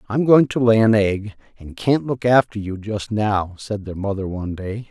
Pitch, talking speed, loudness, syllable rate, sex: 105 Hz, 220 wpm, -19 LUFS, 4.7 syllables/s, male